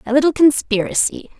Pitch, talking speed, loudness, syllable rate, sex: 270 Hz, 130 wpm, -16 LUFS, 5.9 syllables/s, female